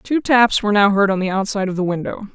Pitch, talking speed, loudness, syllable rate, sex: 205 Hz, 280 wpm, -17 LUFS, 6.6 syllables/s, female